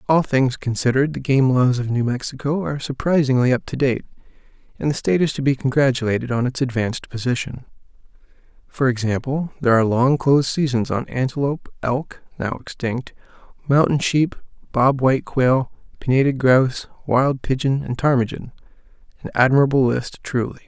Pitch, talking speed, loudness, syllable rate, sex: 130 Hz, 150 wpm, -20 LUFS, 5.7 syllables/s, male